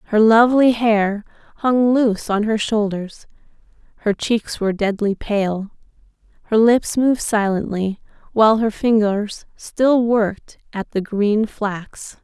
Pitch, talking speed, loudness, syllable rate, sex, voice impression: 215 Hz, 125 wpm, -18 LUFS, 4.0 syllables/s, female, feminine, slightly young, bright, clear, fluent, slightly raspy, friendly, reassuring, elegant, kind, modest